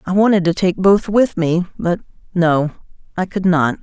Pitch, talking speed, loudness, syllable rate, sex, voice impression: 180 Hz, 190 wpm, -16 LUFS, 4.6 syllables/s, female, very feminine, very adult-like, middle-aged, thin, tensed, powerful, very bright, soft, clear, very fluent, slightly cool, intellectual, very refreshing, sincere, calm, friendly, reassuring, very unique, very elegant, sweet, very lively, kind, slightly intense, sharp